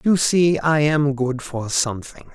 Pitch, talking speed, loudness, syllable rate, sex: 145 Hz, 180 wpm, -19 LUFS, 4.0 syllables/s, male